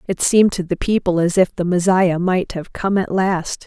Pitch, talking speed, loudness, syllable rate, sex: 185 Hz, 230 wpm, -18 LUFS, 4.8 syllables/s, female